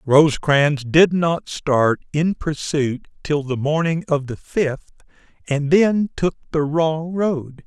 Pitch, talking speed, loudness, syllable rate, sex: 155 Hz, 140 wpm, -19 LUFS, 3.5 syllables/s, male